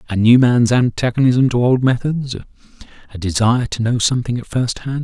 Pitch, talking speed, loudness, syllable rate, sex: 120 Hz, 180 wpm, -16 LUFS, 5.7 syllables/s, male